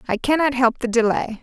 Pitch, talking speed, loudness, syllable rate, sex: 250 Hz, 210 wpm, -19 LUFS, 5.8 syllables/s, female